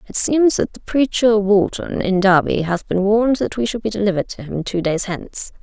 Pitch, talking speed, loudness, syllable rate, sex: 205 Hz, 225 wpm, -18 LUFS, 5.4 syllables/s, female